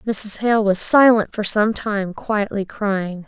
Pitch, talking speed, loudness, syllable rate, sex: 205 Hz, 165 wpm, -18 LUFS, 3.4 syllables/s, female